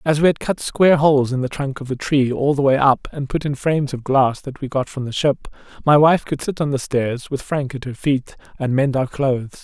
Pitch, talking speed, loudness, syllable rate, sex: 135 Hz, 275 wpm, -19 LUFS, 5.4 syllables/s, male